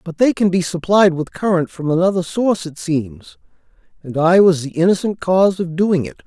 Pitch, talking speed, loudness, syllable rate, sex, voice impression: 175 Hz, 200 wpm, -16 LUFS, 5.4 syllables/s, male, masculine, middle-aged, slightly thick, slightly calm, slightly friendly